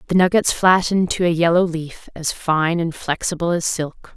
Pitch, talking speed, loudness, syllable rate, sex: 170 Hz, 190 wpm, -19 LUFS, 4.9 syllables/s, female